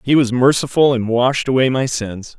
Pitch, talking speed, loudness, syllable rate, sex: 125 Hz, 200 wpm, -16 LUFS, 4.8 syllables/s, male